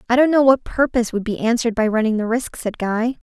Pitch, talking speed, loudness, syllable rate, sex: 235 Hz, 255 wpm, -19 LUFS, 6.4 syllables/s, female